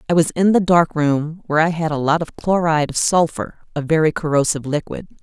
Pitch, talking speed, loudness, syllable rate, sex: 160 Hz, 220 wpm, -18 LUFS, 5.9 syllables/s, female